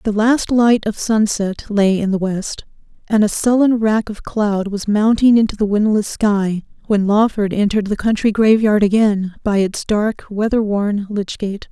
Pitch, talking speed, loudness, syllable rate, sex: 210 Hz, 180 wpm, -16 LUFS, 4.4 syllables/s, female